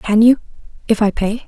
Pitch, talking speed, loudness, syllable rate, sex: 220 Hz, 165 wpm, -16 LUFS, 5.4 syllables/s, female